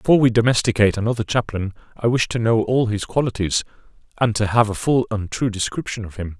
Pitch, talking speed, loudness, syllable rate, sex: 110 Hz, 205 wpm, -20 LUFS, 6.3 syllables/s, male